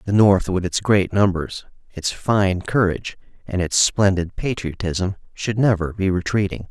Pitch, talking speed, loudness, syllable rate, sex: 95 Hz, 150 wpm, -20 LUFS, 4.5 syllables/s, male